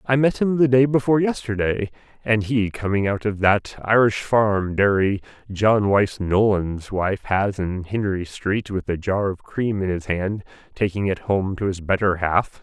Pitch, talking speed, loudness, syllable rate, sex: 105 Hz, 185 wpm, -21 LUFS, 4.3 syllables/s, male